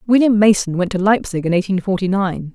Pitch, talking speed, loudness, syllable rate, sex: 195 Hz, 215 wpm, -16 LUFS, 5.8 syllables/s, female